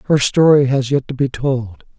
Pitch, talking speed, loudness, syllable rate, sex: 135 Hz, 210 wpm, -16 LUFS, 4.7 syllables/s, male